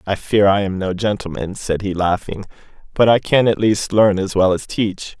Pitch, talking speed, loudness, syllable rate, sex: 100 Hz, 220 wpm, -17 LUFS, 4.8 syllables/s, male